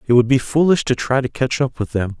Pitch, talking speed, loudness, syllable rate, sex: 130 Hz, 300 wpm, -18 LUFS, 5.8 syllables/s, male